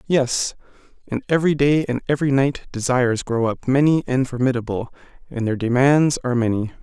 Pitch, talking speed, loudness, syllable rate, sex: 130 Hz, 160 wpm, -20 LUFS, 5.6 syllables/s, male